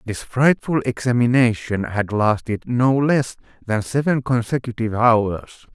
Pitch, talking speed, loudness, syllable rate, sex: 120 Hz, 115 wpm, -19 LUFS, 4.2 syllables/s, male